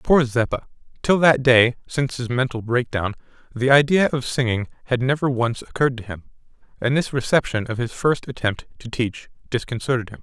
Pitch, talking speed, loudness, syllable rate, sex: 125 Hz, 180 wpm, -21 LUFS, 5.4 syllables/s, male